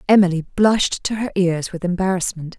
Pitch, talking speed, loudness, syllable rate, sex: 185 Hz, 160 wpm, -19 LUFS, 5.8 syllables/s, female